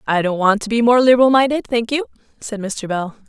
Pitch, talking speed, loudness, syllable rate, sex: 225 Hz, 240 wpm, -16 LUFS, 5.8 syllables/s, female